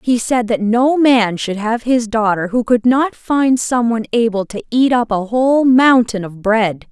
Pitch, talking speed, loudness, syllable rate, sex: 235 Hz, 200 wpm, -15 LUFS, 4.4 syllables/s, female